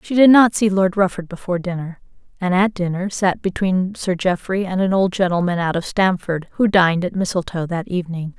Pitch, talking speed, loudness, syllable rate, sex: 185 Hz, 200 wpm, -18 LUFS, 5.5 syllables/s, female